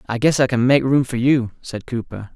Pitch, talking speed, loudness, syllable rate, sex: 125 Hz, 255 wpm, -18 LUFS, 5.1 syllables/s, male